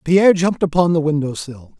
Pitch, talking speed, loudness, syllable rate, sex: 160 Hz, 200 wpm, -16 LUFS, 6.1 syllables/s, male